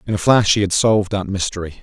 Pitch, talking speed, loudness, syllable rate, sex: 100 Hz, 265 wpm, -17 LUFS, 6.5 syllables/s, male